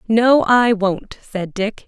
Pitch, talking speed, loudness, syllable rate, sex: 215 Hz, 160 wpm, -16 LUFS, 3.2 syllables/s, female